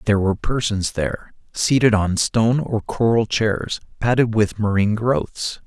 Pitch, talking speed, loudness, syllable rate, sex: 110 Hz, 150 wpm, -20 LUFS, 4.7 syllables/s, male